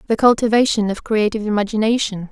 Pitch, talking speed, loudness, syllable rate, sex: 215 Hz, 130 wpm, -17 LUFS, 6.6 syllables/s, female